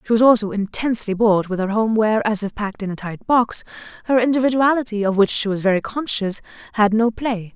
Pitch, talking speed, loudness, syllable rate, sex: 215 Hz, 200 wpm, -19 LUFS, 6.2 syllables/s, female